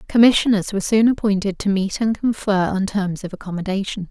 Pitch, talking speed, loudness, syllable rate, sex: 200 Hz, 175 wpm, -19 LUFS, 5.9 syllables/s, female